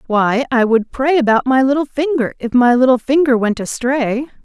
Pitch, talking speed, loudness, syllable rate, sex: 255 Hz, 190 wpm, -15 LUFS, 5.0 syllables/s, female